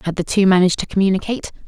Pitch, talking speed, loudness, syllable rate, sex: 190 Hz, 215 wpm, -17 LUFS, 8.5 syllables/s, female